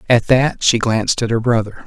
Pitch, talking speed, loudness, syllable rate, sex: 115 Hz, 225 wpm, -16 LUFS, 5.3 syllables/s, male